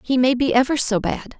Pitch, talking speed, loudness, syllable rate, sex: 255 Hz, 260 wpm, -19 LUFS, 5.4 syllables/s, female